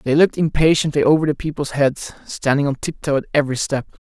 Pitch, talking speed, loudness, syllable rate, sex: 145 Hz, 205 wpm, -18 LUFS, 6.3 syllables/s, male